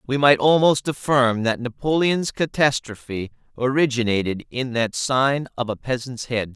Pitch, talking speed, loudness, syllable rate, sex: 125 Hz, 135 wpm, -21 LUFS, 4.5 syllables/s, male